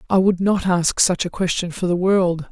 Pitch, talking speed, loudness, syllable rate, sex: 180 Hz, 240 wpm, -19 LUFS, 4.8 syllables/s, female